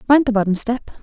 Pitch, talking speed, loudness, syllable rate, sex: 230 Hz, 235 wpm, -18 LUFS, 7.4 syllables/s, female